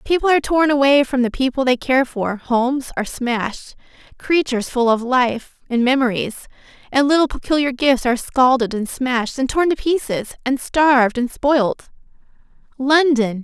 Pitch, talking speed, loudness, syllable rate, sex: 260 Hz, 160 wpm, -18 LUFS, 5.2 syllables/s, female